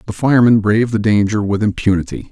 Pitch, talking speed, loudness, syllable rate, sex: 105 Hz, 180 wpm, -14 LUFS, 6.5 syllables/s, male